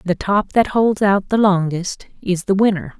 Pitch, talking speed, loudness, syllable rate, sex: 195 Hz, 200 wpm, -17 LUFS, 4.4 syllables/s, female